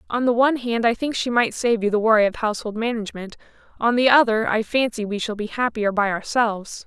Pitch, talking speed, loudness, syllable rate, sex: 225 Hz, 225 wpm, -20 LUFS, 6.1 syllables/s, female